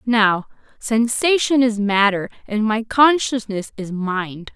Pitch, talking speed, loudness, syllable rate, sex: 225 Hz, 120 wpm, -18 LUFS, 3.6 syllables/s, female